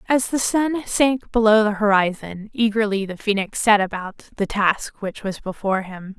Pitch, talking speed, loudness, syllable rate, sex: 210 Hz, 175 wpm, -20 LUFS, 4.6 syllables/s, female